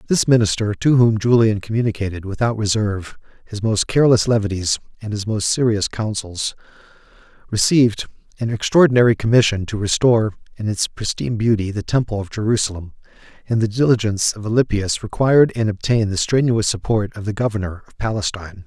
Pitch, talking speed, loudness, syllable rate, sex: 110 Hz, 150 wpm, -18 LUFS, 6.0 syllables/s, male